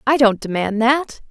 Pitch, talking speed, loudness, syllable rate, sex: 235 Hz, 185 wpm, -17 LUFS, 4.4 syllables/s, female